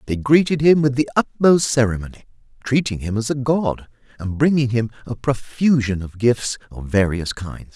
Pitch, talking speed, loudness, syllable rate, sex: 125 Hz, 170 wpm, -19 LUFS, 5.0 syllables/s, male